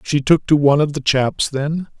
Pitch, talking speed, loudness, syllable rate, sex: 145 Hz, 240 wpm, -17 LUFS, 5.0 syllables/s, male